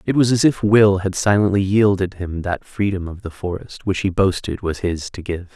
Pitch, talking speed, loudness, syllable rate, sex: 95 Hz, 225 wpm, -19 LUFS, 5.0 syllables/s, male